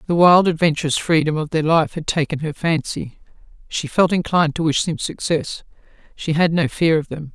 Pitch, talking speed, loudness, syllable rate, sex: 160 Hz, 195 wpm, -19 LUFS, 5.3 syllables/s, female